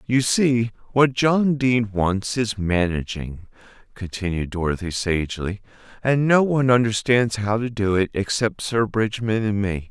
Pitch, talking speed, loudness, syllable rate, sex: 110 Hz, 145 wpm, -21 LUFS, 4.4 syllables/s, male